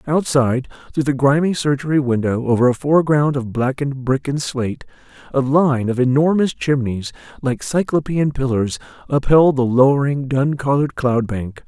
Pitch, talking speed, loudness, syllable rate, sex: 135 Hz, 150 wpm, -18 LUFS, 5.1 syllables/s, male